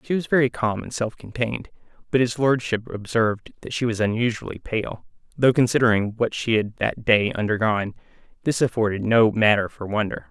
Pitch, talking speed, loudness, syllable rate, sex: 110 Hz, 170 wpm, -22 LUFS, 5.5 syllables/s, male